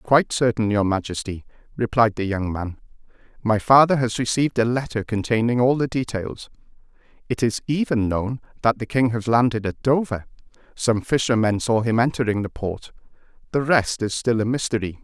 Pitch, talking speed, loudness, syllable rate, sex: 115 Hz, 170 wpm, -21 LUFS, 5.3 syllables/s, male